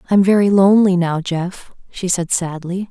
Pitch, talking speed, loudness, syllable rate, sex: 185 Hz, 185 wpm, -16 LUFS, 5.1 syllables/s, female